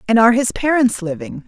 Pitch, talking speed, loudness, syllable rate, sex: 235 Hz, 205 wpm, -16 LUFS, 6.1 syllables/s, female